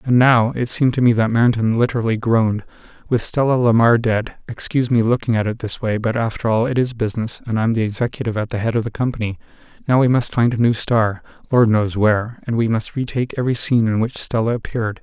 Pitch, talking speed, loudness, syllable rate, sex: 115 Hz, 210 wpm, -18 LUFS, 6.4 syllables/s, male